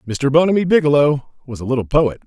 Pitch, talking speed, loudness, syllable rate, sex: 140 Hz, 185 wpm, -16 LUFS, 6.5 syllables/s, male